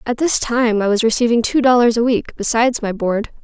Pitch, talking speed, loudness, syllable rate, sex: 230 Hz, 225 wpm, -16 LUFS, 5.8 syllables/s, female